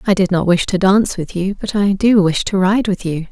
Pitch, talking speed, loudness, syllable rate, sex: 190 Hz, 290 wpm, -15 LUFS, 5.4 syllables/s, female